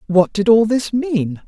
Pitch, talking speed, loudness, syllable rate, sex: 215 Hz, 205 wpm, -16 LUFS, 3.9 syllables/s, female